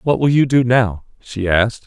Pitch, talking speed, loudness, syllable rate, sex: 115 Hz, 225 wpm, -16 LUFS, 4.9 syllables/s, male